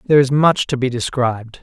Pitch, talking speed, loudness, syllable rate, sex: 130 Hz, 220 wpm, -17 LUFS, 5.9 syllables/s, male